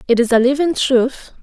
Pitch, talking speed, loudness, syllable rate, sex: 255 Hz, 210 wpm, -15 LUFS, 5.0 syllables/s, female